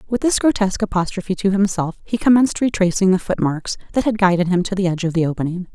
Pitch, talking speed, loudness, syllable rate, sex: 190 Hz, 220 wpm, -18 LUFS, 6.8 syllables/s, female